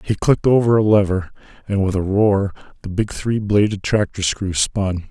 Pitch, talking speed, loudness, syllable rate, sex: 100 Hz, 190 wpm, -18 LUFS, 5.0 syllables/s, male